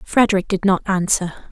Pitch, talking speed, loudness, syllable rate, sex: 190 Hz, 160 wpm, -18 LUFS, 5.2 syllables/s, female